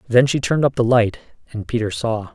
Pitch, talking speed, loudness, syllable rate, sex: 120 Hz, 230 wpm, -19 LUFS, 5.9 syllables/s, male